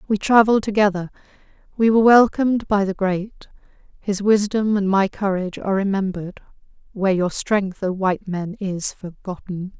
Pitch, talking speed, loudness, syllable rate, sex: 200 Hz, 145 wpm, -19 LUFS, 5.3 syllables/s, female